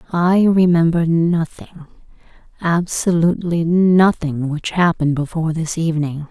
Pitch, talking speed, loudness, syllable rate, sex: 165 Hz, 95 wpm, -17 LUFS, 4.6 syllables/s, female